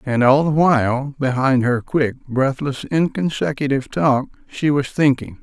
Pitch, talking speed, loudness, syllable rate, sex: 135 Hz, 145 wpm, -18 LUFS, 4.4 syllables/s, male